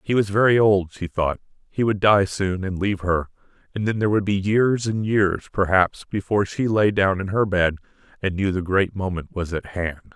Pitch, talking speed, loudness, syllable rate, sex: 95 Hz, 220 wpm, -21 LUFS, 5.1 syllables/s, male